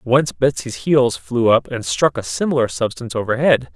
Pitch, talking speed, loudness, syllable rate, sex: 115 Hz, 175 wpm, -18 LUFS, 4.9 syllables/s, male